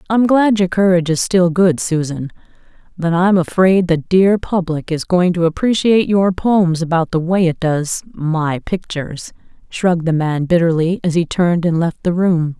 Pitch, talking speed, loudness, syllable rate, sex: 175 Hz, 175 wpm, -15 LUFS, 4.7 syllables/s, female